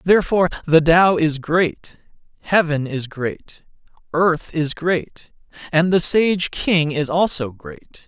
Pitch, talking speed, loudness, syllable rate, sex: 165 Hz, 135 wpm, -18 LUFS, 3.9 syllables/s, male